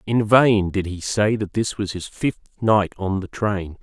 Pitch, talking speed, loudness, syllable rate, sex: 100 Hz, 220 wpm, -21 LUFS, 4.1 syllables/s, male